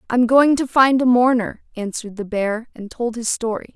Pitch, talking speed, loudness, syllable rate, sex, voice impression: 235 Hz, 225 wpm, -18 LUFS, 5.3 syllables/s, female, very feminine, young, very thin, tensed, powerful, bright, soft, very clear, fluent, slightly raspy, cute, intellectual, very refreshing, sincere, slightly calm, friendly, slightly reassuring, unique, slightly elegant, wild, slightly sweet, very lively, strict, intense, slightly sharp, light